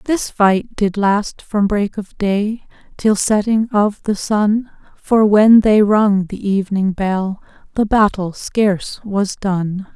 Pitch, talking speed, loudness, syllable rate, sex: 205 Hz, 150 wpm, -16 LUFS, 3.5 syllables/s, female